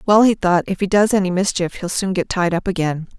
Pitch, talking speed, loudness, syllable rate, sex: 185 Hz, 265 wpm, -18 LUFS, 5.9 syllables/s, female